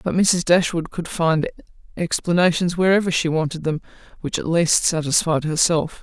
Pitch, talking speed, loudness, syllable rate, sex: 165 Hz, 150 wpm, -20 LUFS, 4.9 syllables/s, female